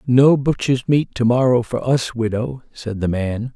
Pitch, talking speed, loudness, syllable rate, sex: 120 Hz, 185 wpm, -18 LUFS, 4.3 syllables/s, male